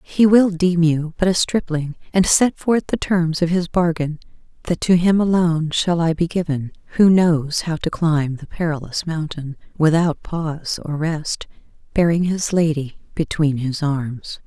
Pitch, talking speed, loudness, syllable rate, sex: 165 Hz, 170 wpm, -19 LUFS, 4.3 syllables/s, female